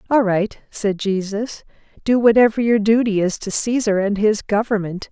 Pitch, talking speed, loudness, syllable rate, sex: 210 Hz, 165 wpm, -18 LUFS, 4.8 syllables/s, female